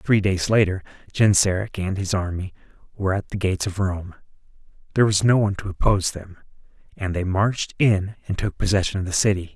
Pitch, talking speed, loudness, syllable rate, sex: 95 Hz, 190 wpm, -22 LUFS, 6.0 syllables/s, male